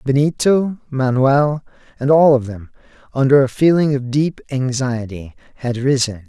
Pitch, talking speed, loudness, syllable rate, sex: 135 Hz, 135 wpm, -16 LUFS, 4.5 syllables/s, male